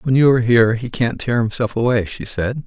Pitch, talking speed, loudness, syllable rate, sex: 120 Hz, 250 wpm, -17 LUFS, 5.8 syllables/s, male